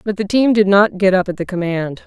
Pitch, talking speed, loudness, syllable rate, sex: 195 Hz, 290 wpm, -15 LUFS, 5.7 syllables/s, female